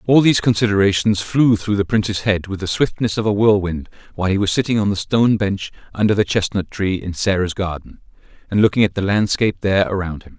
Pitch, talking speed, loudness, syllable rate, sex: 100 Hz, 215 wpm, -18 LUFS, 6.2 syllables/s, male